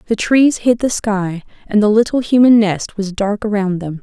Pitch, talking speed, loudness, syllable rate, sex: 210 Hz, 210 wpm, -15 LUFS, 4.7 syllables/s, female